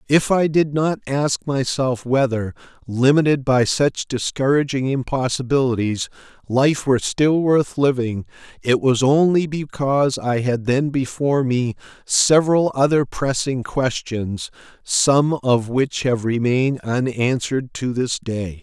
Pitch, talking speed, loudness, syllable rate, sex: 130 Hz, 125 wpm, -19 LUFS, 4.1 syllables/s, male